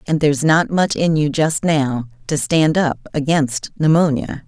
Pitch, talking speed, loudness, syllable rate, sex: 150 Hz, 175 wpm, -17 LUFS, 4.2 syllables/s, female